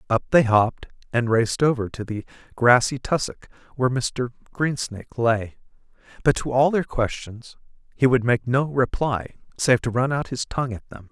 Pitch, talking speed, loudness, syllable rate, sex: 125 Hz, 175 wpm, -22 LUFS, 5.0 syllables/s, male